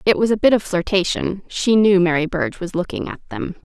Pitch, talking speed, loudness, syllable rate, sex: 195 Hz, 210 wpm, -19 LUFS, 5.6 syllables/s, female